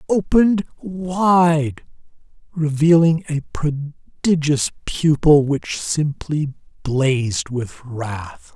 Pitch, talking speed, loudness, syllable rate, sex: 150 Hz, 75 wpm, -19 LUFS, 2.8 syllables/s, male